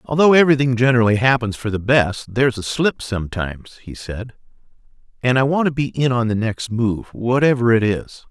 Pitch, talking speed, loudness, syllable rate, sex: 120 Hz, 195 wpm, -18 LUFS, 5.7 syllables/s, male